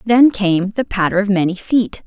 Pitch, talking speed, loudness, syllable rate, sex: 200 Hz, 205 wpm, -16 LUFS, 4.6 syllables/s, female